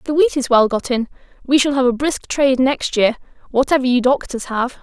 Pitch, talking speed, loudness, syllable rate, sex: 260 Hz, 235 wpm, -17 LUFS, 5.7 syllables/s, female